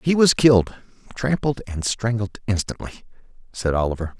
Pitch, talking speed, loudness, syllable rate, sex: 110 Hz, 115 wpm, -21 LUFS, 5.0 syllables/s, male